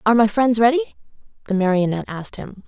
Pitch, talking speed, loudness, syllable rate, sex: 215 Hz, 180 wpm, -19 LUFS, 7.0 syllables/s, female